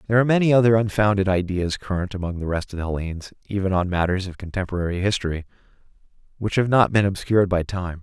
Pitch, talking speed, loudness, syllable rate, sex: 95 Hz, 195 wpm, -22 LUFS, 6.9 syllables/s, male